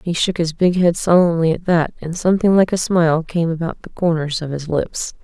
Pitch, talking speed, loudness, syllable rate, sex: 170 Hz, 230 wpm, -17 LUFS, 5.4 syllables/s, female